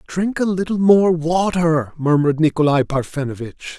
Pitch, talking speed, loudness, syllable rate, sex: 160 Hz, 125 wpm, -17 LUFS, 4.7 syllables/s, male